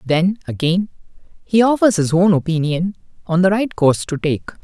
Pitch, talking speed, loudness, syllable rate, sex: 180 Hz, 170 wpm, -17 LUFS, 5.1 syllables/s, male